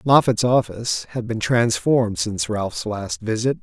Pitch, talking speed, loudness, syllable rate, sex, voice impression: 110 Hz, 150 wpm, -21 LUFS, 4.7 syllables/s, male, masculine, adult-like, tensed, powerful, bright, fluent, sincere, friendly, unique, wild, intense